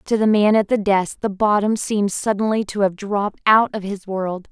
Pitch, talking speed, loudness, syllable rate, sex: 205 Hz, 225 wpm, -19 LUFS, 5.1 syllables/s, female